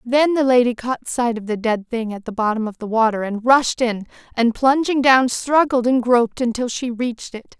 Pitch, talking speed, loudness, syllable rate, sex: 240 Hz, 220 wpm, -18 LUFS, 5.0 syllables/s, female